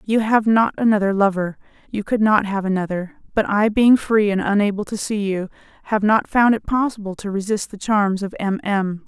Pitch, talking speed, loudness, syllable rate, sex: 205 Hz, 205 wpm, -19 LUFS, 5.1 syllables/s, female